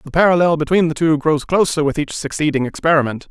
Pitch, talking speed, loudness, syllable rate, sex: 155 Hz, 200 wpm, -16 LUFS, 6.1 syllables/s, male